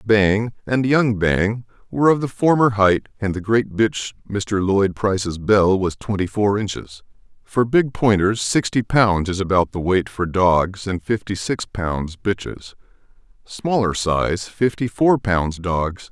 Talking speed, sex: 180 wpm, male